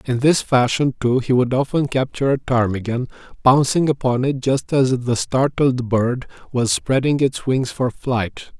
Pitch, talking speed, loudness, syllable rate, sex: 130 Hz, 165 wpm, -19 LUFS, 4.4 syllables/s, male